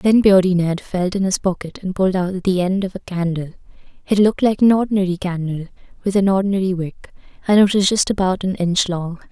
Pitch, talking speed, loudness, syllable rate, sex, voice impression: 190 Hz, 215 wpm, -18 LUFS, 5.8 syllables/s, female, feminine, slightly young, slightly relaxed, powerful, bright, soft, slightly muffled, slightly raspy, calm, reassuring, elegant, kind, modest